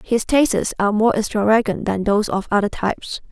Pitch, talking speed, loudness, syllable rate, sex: 210 Hz, 180 wpm, -19 LUFS, 6.3 syllables/s, female